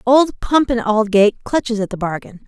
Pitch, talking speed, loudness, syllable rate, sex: 230 Hz, 195 wpm, -17 LUFS, 5.2 syllables/s, female